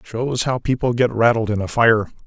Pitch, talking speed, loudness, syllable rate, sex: 115 Hz, 210 wpm, -18 LUFS, 4.9 syllables/s, male